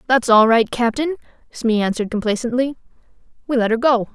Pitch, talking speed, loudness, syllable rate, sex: 240 Hz, 175 wpm, -18 LUFS, 6.2 syllables/s, female